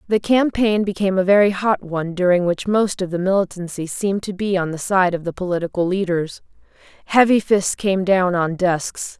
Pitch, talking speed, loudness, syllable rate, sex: 190 Hz, 190 wpm, -19 LUFS, 5.3 syllables/s, female